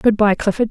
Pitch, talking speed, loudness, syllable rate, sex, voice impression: 210 Hz, 255 wpm, -16 LUFS, 6.0 syllables/s, female, very feminine, slightly young, very adult-like, very thin, slightly tensed, weak, slightly dark, hard, muffled, very fluent, slightly raspy, cute, slightly cool, very intellectual, refreshing, very sincere, slightly calm, very friendly, very reassuring, very unique, elegant, slightly wild, sweet, slightly lively, very kind, slightly intense, modest